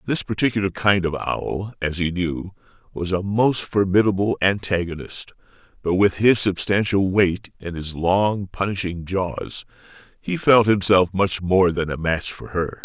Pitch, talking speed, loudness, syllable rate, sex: 95 Hz, 155 wpm, -21 LUFS, 4.2 syllables/s, male